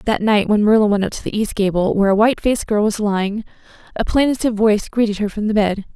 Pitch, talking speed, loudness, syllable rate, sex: 210 Hz, 250 wpm, -17 LUFS, 6.9 syllables/s, female